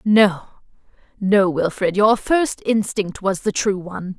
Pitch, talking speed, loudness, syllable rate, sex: 200 Hz, 145 wpm, -19 LUFS, 3.9 syllables/s, female